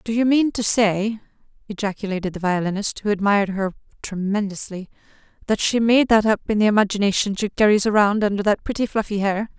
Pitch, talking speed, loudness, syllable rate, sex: 205 Hz, 175 wpm, -20 LUFS, 6.0 syllables/s, female